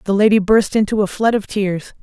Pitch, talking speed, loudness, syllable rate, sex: 205 Hz, 235 wpm, -16 LUFS, 5.4 syllables/s, female